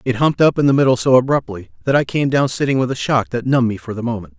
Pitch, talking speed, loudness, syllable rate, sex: 130 Hz, 300 wpm, -17 LUFS, 7.0 syllables/s, male